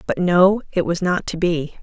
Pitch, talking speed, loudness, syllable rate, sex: 175 Hz, 230 wpm, -19 LUFS, 4.5 syllables/s, female